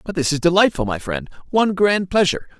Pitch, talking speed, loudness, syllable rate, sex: 170 Hz, 185 wpm, -18 LUFS, 6.4 syllables/s, male